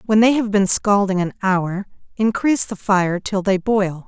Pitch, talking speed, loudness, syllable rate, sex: 200 Hz, 190 wpm, -18 LUFS, 4.5 syllables/s, female